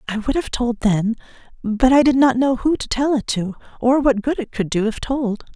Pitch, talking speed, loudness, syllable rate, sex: 245 Hz, 250 wpm, -19 LUFS, 5.0 syllables/s, female